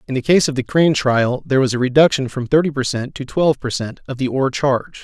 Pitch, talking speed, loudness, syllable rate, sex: 135 Hz, 275 wpm, -17 LUFS, 6.5 syllables/s, male